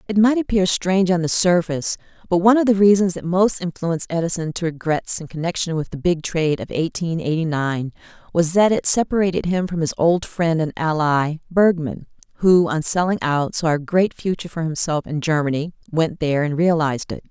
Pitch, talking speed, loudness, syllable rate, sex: 170 Hz, 200 wpm, -20 LUFS, 5.6 syllables/s, female